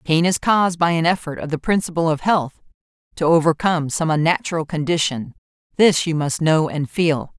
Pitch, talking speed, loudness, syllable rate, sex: 165 Hz, 180 wpm, -19 LUFS, 5.4 syllables/s, female